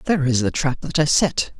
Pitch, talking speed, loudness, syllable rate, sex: 140 Hz, 265 wpm, -19 LUFS, 5.6 syllables/s, male